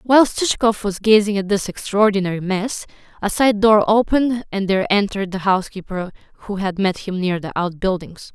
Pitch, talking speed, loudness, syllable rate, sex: 200 Hz, 175 wpm, -19 LUFS, 5.5 syllables/s, female